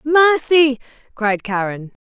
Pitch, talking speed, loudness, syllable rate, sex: 255 Hz, 85 wpm, -16 LUFS, 3.3 syllables/s, female